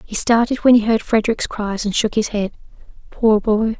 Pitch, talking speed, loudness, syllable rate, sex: 220 Hz, 190 wpm, -17 LUFS, 5.4 syllables/s, female